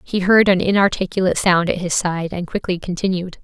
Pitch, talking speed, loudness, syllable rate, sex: 185 Hz, 190 wpm, -18 LUFS, 5.7 syllables/s, female